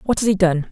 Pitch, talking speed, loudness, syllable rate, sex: 185 Hz, 335 wpm, -18 LUFS, 6.0 syllables/s, female